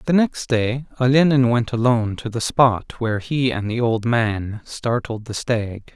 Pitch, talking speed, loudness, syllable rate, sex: 120 Hz, 180 wpm, -20 LUFS, 4.2 syllables/s, male